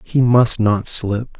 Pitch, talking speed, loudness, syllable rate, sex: 115 Hz, 170 wpm, -16 LUFS, 3.0 syllables/s, male